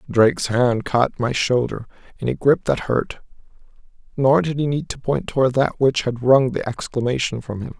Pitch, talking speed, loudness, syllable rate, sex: 125 Hz, 185 wpm, -20 LUFS, 4.9 syllables/s, male